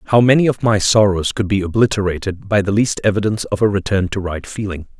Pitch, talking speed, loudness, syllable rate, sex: 100 Hz, 215 wpm, -17 LUFS, 6.0 syllables/s, male